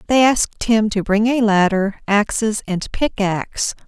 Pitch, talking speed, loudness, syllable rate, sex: 215 Hz, 155 wpm, -18 LUFS, 4.3 syllables/s, female